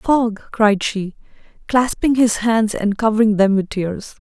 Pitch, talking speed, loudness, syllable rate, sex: 215 Hz, 155 wpm, -17 LUFS, 4.0 syllables/s, female